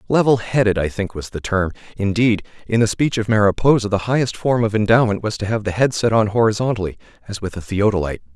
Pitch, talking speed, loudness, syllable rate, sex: 105 Hz, 215 wpm, -19 LUFS, 6.3 syllables/s, male